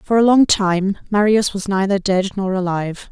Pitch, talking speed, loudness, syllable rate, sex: 195 Hz, 195 wpm, -17 LUFS, 4.9 syllables/s, female